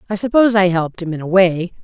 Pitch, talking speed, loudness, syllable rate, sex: 190 Hz, 260 wpm, -15 LUFS, 7.1 syllables/s, female